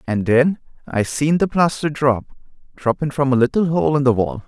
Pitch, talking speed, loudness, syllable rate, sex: 135 Hz, 200 wpm, -18 LUFS, 5.1 syllables/s, male